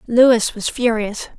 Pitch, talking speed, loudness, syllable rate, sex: 235 Hz, 130 wpm, -17 LUFS, 3.5 syllables/s, female